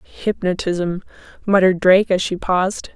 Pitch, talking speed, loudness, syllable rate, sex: 185 Hz, 120 wpm, -18 LUFS, 5.0 syllables/s, female